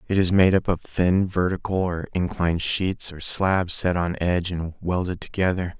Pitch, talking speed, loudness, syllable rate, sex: 90 Hz, 185 wpm, -23 LUFS, 4.8 syllables/s, male